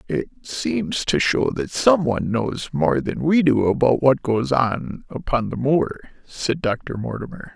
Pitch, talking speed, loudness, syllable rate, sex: 130 Hz, 165 wpm, -21 LUFS, 4.0 syllables/s, male